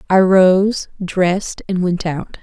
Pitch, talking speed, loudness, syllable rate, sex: 185 Hz, 150 wpm, -16 LUFS, 3.4 syllables/s, female